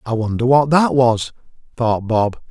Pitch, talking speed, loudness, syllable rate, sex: 120 Hz, 165 wpm, -16 LUFS, 4.2 syllables/s, male